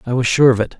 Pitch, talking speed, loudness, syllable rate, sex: 125 Hz, 380 wpm, -14 LUFS, 7.5 syllables/s, male